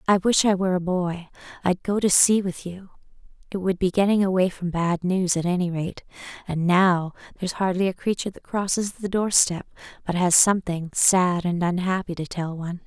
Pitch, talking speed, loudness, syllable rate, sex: 185 Hz, 200 wpm, -22 LUFS, 5.3 syllables/s, female